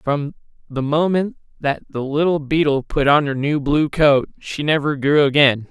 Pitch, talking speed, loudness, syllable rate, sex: 145 Hz, 180 wpm, -18 LUFS, 4.4 syllables/s, male